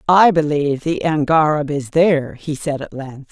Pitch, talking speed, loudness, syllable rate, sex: 150 Hz, 180 wpm, -17 LUFS, 4.8 syllables/s, female